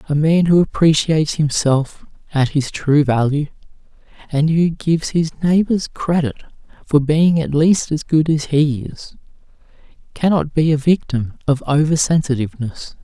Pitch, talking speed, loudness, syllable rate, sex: 150 Hz, 145 wpm, -17 LUFS, 4.6 syllables/s, male